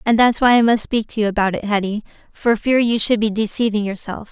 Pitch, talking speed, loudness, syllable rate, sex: 220 Hz, 250 wpm, -17 LUFS, 5.9 syllables/s, female